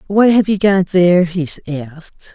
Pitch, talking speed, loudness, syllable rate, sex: 180 Hz, 180 wpm, -14 LUFS, 4.5 syllables/s, female